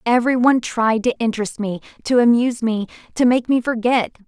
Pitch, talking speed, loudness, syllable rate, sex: 235 Hz, 180 wpm, -18 LUFS, 6.1 syllables/s, female